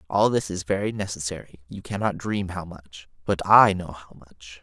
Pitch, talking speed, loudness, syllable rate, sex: 90 Hz, 195 wpm, -23 LUFS, 4.8 syllables/s, male